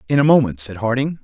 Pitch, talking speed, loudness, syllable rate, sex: 125 Hz, 245 wpm, -17 LUFS, 6.7 syllables/s, male